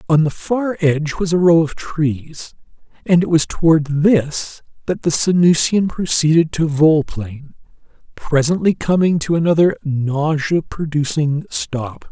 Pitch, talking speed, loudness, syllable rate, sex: 160 Hz, 135 wpm, -16 LUFS, 4.1 syllables/s, male